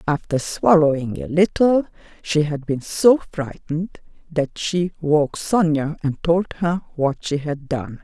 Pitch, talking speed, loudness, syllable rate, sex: 160 Hz, 150 wpm, -20 LUFS, 3.9 syllables/s, female